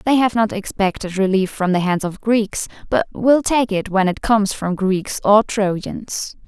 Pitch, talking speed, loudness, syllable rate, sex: 205 Hz, 195 wpm, -18 LUFS, 4.4 syllables/s, female